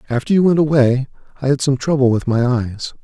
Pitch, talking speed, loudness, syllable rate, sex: 135 Hz, 220 wpm, -16 LUFS, 5.8 syllables/s, male